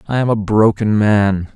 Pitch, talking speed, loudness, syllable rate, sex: 105 Hz, 195 wpm, -15 LUFS, 4.4 syllables/s, male